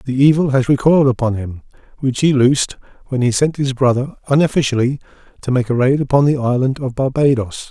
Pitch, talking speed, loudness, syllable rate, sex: 130 Hz, 185 wpm, -16 LUFS, 5.9 syllables/s, male